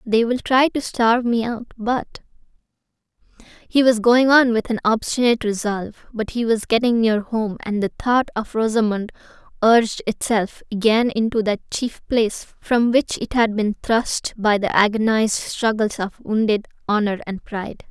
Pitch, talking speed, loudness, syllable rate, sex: 225 Hz, 165 wpm, -19 LUFS, 4.8 syllables/s, female